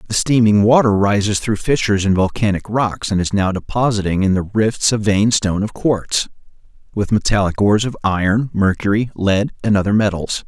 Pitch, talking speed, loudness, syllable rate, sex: 105 Hz, 180 wpm, -16 LUFS, 5.2 syllables/s, male